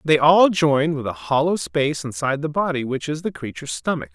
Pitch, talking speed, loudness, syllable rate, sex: 140 Hz, 215 wpm, -20 LUFS, 5.7 syllables/s, male